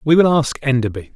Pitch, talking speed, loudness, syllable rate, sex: 135 Hz, 205 wpm, -17 LUFS, 5.8 syllables/s, male